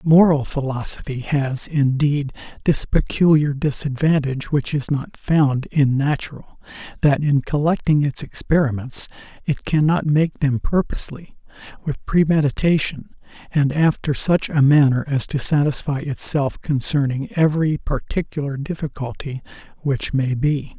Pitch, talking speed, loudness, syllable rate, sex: 145 Hz, 120 wpm, -20 LUFS, 4.5 syllables/s, male